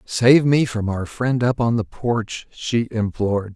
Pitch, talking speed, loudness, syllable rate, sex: 115 Hz, 185 wpm, -20 LUFS, 3.8 syllables/s, male